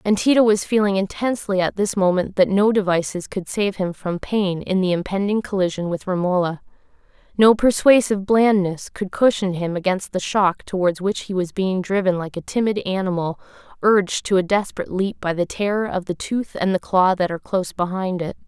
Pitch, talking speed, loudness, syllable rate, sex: 190 Hz, 195 wpm, -20 LUFS, 5.5 syllables/s, female